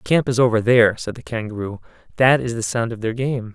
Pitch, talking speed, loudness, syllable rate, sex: 115 Hz, 255 wpm, -19 LUFS, 6.4 syllables/s, male